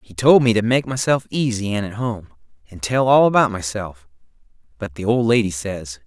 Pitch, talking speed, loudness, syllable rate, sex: 110 Hz, 200 wpm, -19 LUFS, 5.2 syllables/s, male